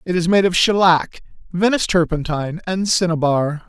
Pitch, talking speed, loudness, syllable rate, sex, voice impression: 175 Hz, 145 wpm, -17 LUFS, 5.3 syllables/s, male, masculine, middle-aged, tensed, powerful, slightly halting, slightly mature, friendly, wild, lively, strict, intense, slightly sharp, slightly light